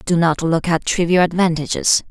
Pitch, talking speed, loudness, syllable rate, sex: 170 Hz, 170 wpm, -17 LUFS, 5.1 syllables/s, female